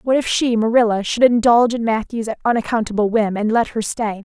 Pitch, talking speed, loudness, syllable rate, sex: 225 Hz, 180 wpm, -17 LUFS, 5.5 syllables/s, female